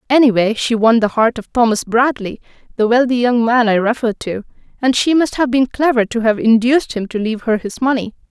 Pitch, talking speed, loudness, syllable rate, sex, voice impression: 235 Hz, 215 wpm, -15 LUFS, 5.8 syllables/s, female, feminine, adult-like, powerful, slightly bright, muffled, slightly raspy, intellectual, elegant, lively, slightly strict, slightly sharp